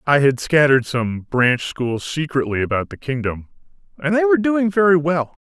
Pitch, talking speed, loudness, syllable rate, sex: 145 Hz, 175 wpm, -18 LUFS, 5.1 syllables/s, male